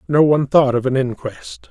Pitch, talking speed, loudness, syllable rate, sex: 135 Hz, 210 wpm, -16 LUFS, 5.2 syllables/s, male